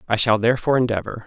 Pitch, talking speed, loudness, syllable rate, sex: 115 Hz, 190 wpm, -20 LUFS, 8.1 syllables/s, male